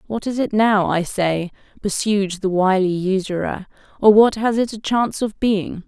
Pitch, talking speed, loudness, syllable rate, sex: 200 Hz, 185 wpm, -19 LUFS, 4.4 syllables/s, female